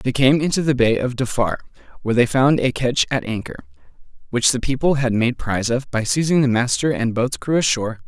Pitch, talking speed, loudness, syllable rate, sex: 130 Hz, 215 wpm, -19 LUFS, 5.9 syllables/s, male